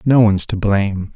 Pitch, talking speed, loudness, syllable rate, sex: 100 Hz, 210 wpm, -16 LUFS, 5.7 syllables/s, male